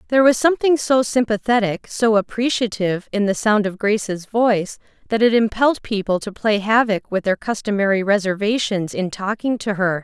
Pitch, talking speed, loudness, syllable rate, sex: 215 Hz, 165 wpm, -19 LUFS, 5.4 syllables/s, female